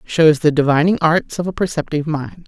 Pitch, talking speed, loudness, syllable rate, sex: 160 Hz, 195 wpm, -17 LUFS, 5.6 syllables/s, female